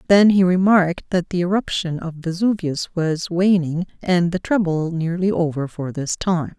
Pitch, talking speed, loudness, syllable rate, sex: 175 Hz, 165 wpm, -20 LUFS, 4.6 syllables/s, female